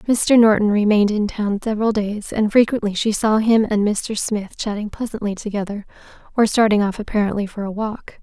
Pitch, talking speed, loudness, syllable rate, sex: 210 Hz, 180 wpm, -19 LUFS, 5.4 syllables/s, female